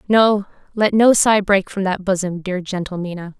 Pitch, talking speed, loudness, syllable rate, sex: 195 Hz, 195 wpm, -17 LUFS, 4.8 syllables/s, female